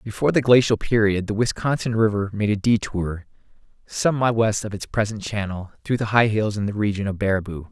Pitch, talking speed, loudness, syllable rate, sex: 105 Hz, 200 wpm, -21 LUFS, 5.8 syllables/s, male